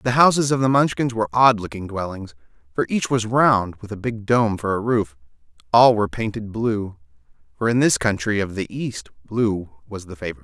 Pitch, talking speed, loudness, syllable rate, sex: 110 Hz, 205 wpm, -20 LUFS, 5.7 syllables/s, male